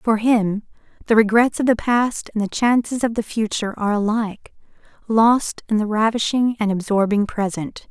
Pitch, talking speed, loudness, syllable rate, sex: 220 Hz, 165 wpm, -19 LUFS, 5.0 syllables/s, female